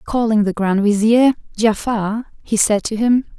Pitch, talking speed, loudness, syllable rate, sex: 220 Hz, 160 wpm, -17 LUFS, 4.1 syllables/s, female